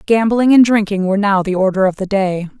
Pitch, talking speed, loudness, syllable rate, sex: 200 Hz, 230 wpm, -14 LUFS, 5.8 syllables/s, female